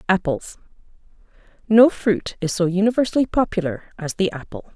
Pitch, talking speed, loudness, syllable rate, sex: 195 Hz, 115 wpm, -20 LUFS, 5.4 syllables/s, female